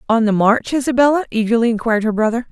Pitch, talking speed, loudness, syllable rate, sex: 235 Hz, 190 wpm, -16 LUFS, 7.1 syllables/s, female